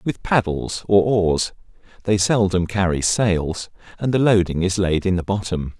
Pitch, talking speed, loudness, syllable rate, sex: 95 Hz, 165 wpm, -20 LUFS, 4.3 syllables/s, male